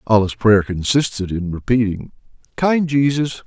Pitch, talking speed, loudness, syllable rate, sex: 115 Hz, 140 wpm, -18 LUFS, 4.5 syllables/s, male